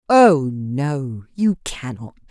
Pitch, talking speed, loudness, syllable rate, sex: 150 Hz, 105 wpm, -19 LUFS, 2.8 syllables/s, female